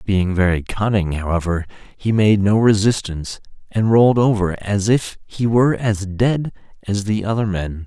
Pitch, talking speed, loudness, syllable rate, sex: 105 Hz, 160 wpm, -18 LUFS, 4.7 syllables/s, male